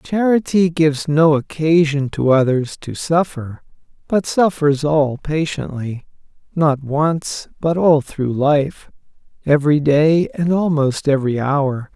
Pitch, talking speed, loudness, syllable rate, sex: 150 Hz, 120 wpm, -17 LUFS, 3.8 syllables/s, male